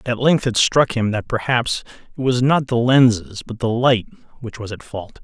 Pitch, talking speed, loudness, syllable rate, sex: 120 Hz, 220 wpm, -18 LUFS, 4.7 syllables/s, male